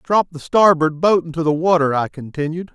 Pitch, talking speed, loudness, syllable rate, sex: 165 Hz, 195 wpm, -17 LUFS, 5.3 syllables/s, male